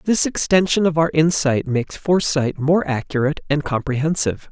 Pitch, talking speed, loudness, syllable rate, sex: 150 Hz, 145 wpm, -19 LUFS, 5.5 syllables/s, male